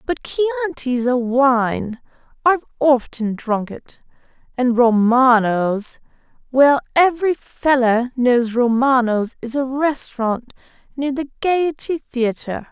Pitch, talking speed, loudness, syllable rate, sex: 260 Hz, 100 wpm, -18 LUFS, 3.7 syllables/s, female